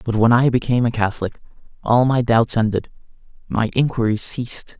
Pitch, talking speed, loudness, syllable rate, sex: 115 Hz, 165 wpm, -19 LUFS, 5.7 syllables/s, male